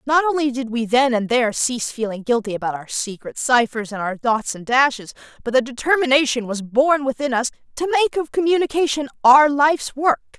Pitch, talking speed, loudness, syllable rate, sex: 260 Hz, 190 wpm, -19 LUFS, 5.6 syllables/s, female